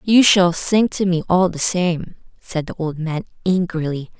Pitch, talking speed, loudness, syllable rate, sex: 175 Hz, 185 wpm, -18 LUFS, 4.3 syllables/s, female